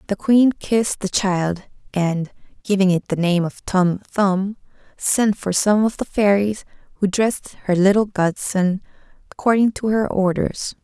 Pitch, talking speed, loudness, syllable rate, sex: 195 Hz, 155 wpm, -19 LUFS, 4.4 syllables/s, female